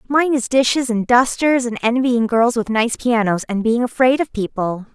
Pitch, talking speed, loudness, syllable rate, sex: 240 Hz, 195 wpm, -17 LUFS, 4.7 syllables/s, female